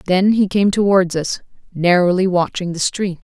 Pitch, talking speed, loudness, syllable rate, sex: 185 Hz, 165 wpm, -16 LUFS, 4.7 syllables/s, female